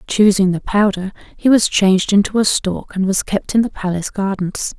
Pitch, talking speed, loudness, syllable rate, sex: 195 Hz, 200 wpm, -16 LUFS, 5.2 syllables/s, female